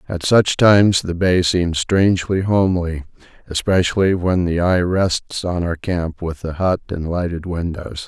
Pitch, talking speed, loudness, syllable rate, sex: 90 Hz, 165 wpm, -18 LUFS, 4.3 syllables/s, male